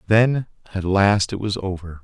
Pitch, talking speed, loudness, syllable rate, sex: 100 Hz, 175 wpm, -20 LUFS, 4.5 syllables/s, male